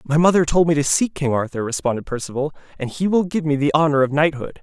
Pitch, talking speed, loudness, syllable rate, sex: 150 Hz, 245 wpm, -19 LUFS, 6.4 syllables/s, male